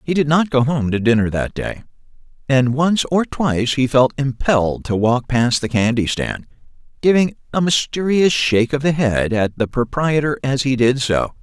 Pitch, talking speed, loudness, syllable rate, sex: 130 Hz, 190 wpm, -17 LUFS, 4.8 syllables/s, male